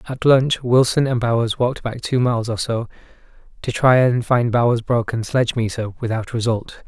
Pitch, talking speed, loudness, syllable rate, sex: 120 Hz, 175 wpm, -19 LUFS, 5.3 syllables/s, male